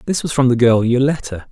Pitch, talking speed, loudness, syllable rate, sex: 130 Hz, 235 wpm, -15 LUFS, 5.9 syllables/s, male